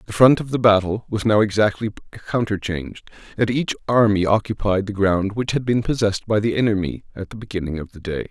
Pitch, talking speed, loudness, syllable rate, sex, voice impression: 105 Hz, 200 wpm, -20 LUFS, 6.0 syllables/s, male, masculine, adult-like, slightly thick, cool, intellectual, slightly wild